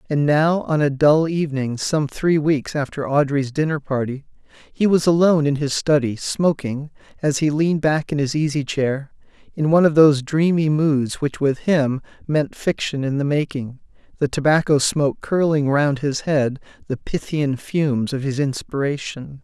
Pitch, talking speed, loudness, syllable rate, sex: 145 Hz, 170 wpm, -20 LUFS, 4.7 syllables/s, male